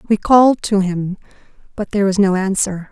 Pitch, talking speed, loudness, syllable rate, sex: 195 Hz, 185 wpm, -16 LUFS, 5.6 syllables/s, female